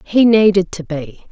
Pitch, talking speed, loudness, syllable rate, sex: 185 Hz, 185 wpm, -14 LUFS, 4.2 syllables/s, female